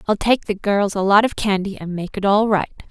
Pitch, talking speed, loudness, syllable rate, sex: 200 Hz, 270 wpm, -19 LUFS, 5.4 syllables/s, female